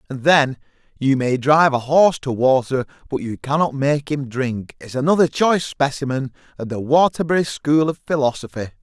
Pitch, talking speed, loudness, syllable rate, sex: 140 Hz, 170 wpm, -19 LUFS, 5.4 syllables/s, male